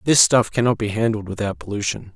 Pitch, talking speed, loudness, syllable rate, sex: 105 Hz, 195 wpm, -20 LUFS, 6.0 syllables/s, male